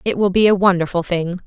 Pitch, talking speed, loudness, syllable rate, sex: 185 Hz, 245 wpm, -16 LUFS, 6.0 syllables/s, female